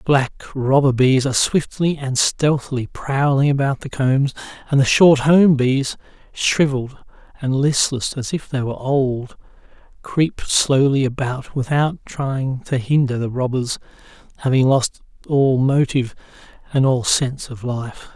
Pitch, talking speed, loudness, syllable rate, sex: 135 Hz, 140 wpm, -18 LUFS, 4.2 syllables/s, male